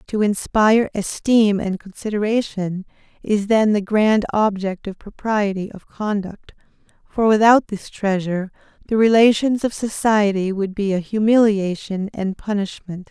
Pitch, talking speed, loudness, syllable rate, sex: 205 Hz, 130 wpm, -19 LUFS, 4.4 syllables/s, female